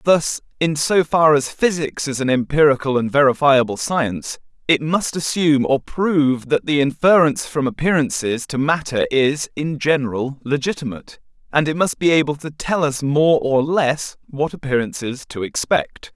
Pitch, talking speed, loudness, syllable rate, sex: 145 Hz, 160 wpm, -18 LUFS, 4.8 syllables/s, male